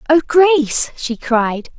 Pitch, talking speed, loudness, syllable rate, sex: 275 Hz, 135 wpm, -15 LUFS, 3.5 syllables/s, female